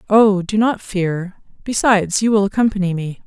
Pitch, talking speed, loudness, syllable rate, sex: 200 Hz, 165 wpm, -17 LUFS, 4.9 syllables/s, female